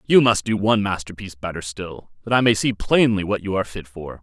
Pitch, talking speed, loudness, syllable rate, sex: 100 Hz, 240 wpm, -20 LUFS, 6.0 syllables/s, male